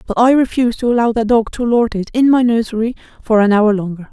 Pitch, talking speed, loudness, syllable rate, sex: 230 Hz, 250 wpm, -14 LUFS, 6.3 syllables/s, female